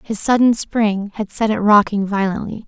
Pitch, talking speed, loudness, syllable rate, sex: 210 Hz, 180 wpm, -17 LUFS, 4.8 syllables/s, female